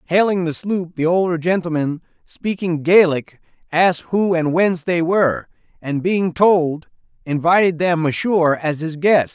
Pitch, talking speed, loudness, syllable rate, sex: 170 Hz, 150 wpm, -18 LUFS, 4.5 syllables/s, male